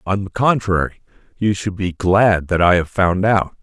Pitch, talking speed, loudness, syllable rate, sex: 95 Hz, 200 wpm, -17 LUFS, 4.5 syllables/s, male